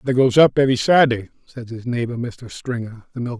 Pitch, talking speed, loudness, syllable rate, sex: 120 Hz, 210 wpm, -19 LUFS, 6.3 syllables/s, male